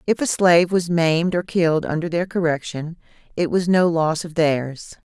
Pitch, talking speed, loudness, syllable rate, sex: 170 Hz, 190 wpm, -19 LUFS, 4.9 syllables/s, female